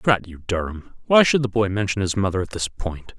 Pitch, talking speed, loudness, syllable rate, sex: 100 Hz, 245 wpm, -21 LUFS, 5.6 syllables/s, male